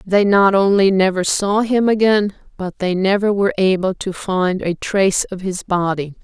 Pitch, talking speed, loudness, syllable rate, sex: 195 Hz, 185 wpm, -17 LUFS, 4.7 syllables/s, female